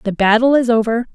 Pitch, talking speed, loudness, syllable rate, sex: 230 Hz, 210 wpm, -14 LUFS, 6.1 syllables/s, female